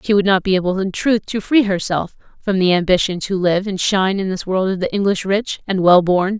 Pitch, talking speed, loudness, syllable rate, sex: 190 Hz, 255 wpm, -17 LUFS, 5.5 syllables/s, female